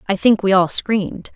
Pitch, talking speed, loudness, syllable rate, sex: 195 Hz, 220 wpm, -16 LUFS, 5.1 syllables/s, female